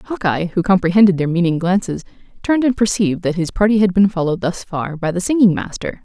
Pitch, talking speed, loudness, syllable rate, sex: 185 Hz, 210 wpm, -17 LUFS, 6.2 syllables/s, female